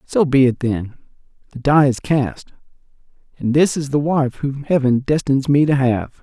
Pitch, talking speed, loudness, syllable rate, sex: 135 Hz, 185 wpm, -17 LUFS, 4.6 syllables/s, male